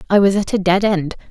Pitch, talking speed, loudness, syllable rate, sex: 190 Hz, 275 wpm, -16 LUFS, 6.0 syllables/s, female